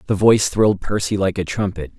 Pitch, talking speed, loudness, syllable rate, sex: 100 Hz, 210 wpm, -18 LUFS, 6.2 syllables/s, male